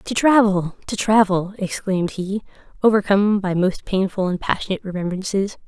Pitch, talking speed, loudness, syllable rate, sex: 195 Hz, 135 wpm, -20 LUFS, 5.4 syllables/s, female